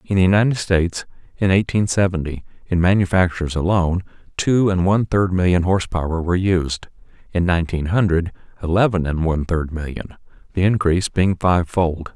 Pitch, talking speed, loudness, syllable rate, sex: 90 Hz, 160 wpm, -19 LUFS, 5.7 syllables/s, male